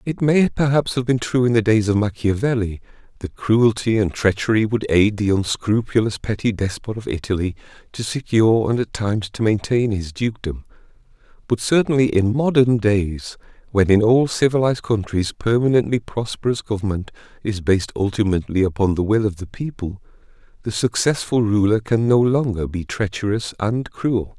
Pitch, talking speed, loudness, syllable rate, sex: 110 Hz, 155 wpm, -19 LUFS, 5.2 syllables/s, male